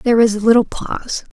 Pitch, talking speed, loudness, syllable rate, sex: 225 Hz, 220 wpm, -16 LUFS, 6.5 syllables/s, female